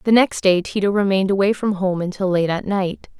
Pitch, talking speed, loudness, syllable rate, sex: 195 Hz, 225 wpm, -19 LUFS, 5.7 syllables/s, female